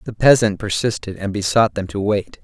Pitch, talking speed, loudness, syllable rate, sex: 105 Hz, 195 wpm, -18 LUFS, 5.2 syllables/s, male